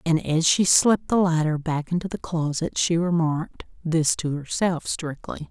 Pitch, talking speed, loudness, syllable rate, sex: 165 Hz, 165 wpm, -23 LUFS, 4.6 syllables/s, female